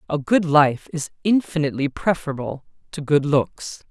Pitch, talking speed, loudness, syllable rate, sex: 155 Hz, 140 wpm, -21 LUFS, 4.9 syllables/s, male